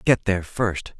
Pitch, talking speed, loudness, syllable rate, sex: 100 Hz, 180 wpm, -23 LUFS, 4.5 syllables/s, male